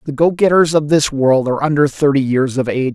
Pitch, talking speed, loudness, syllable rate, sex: 145 Hz, 245 wpm, -14 LUFS, 5.9 syllables/s, male